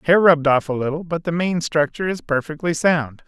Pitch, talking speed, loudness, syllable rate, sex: 160 Hz, 220 wpm, -19 LUFS, 5.8 syllables/s, male